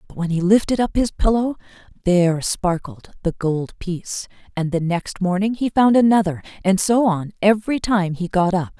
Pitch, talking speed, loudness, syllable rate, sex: 190 Hz, 185 wpm, -19 LUFS, 5.1 syllables/s, female